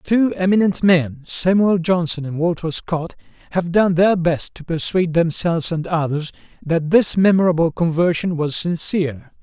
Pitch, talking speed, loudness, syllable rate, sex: 170 Hz, 145 wpm, -18 LUFS, 4.7 syllables/s, male